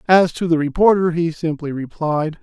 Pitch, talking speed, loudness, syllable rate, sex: 165 Hz, 175 wpm, -18 LUFS, 4.9 syllables/s, male